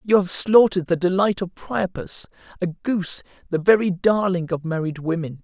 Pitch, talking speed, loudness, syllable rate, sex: 180 Hz, 165 wpm, -21 LUFS, 5.1 syllables/s, male